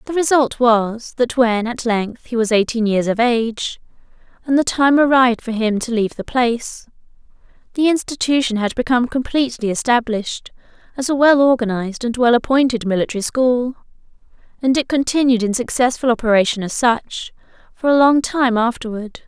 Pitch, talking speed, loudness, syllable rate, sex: 240 Hz, 160 wpm, -17 LUFS, 5.4 syllables/s, female